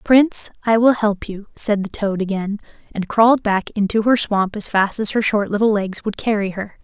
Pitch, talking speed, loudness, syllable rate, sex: 210 Hz, 220 wpm, -18 LUFS, 5.0 syllables/s, female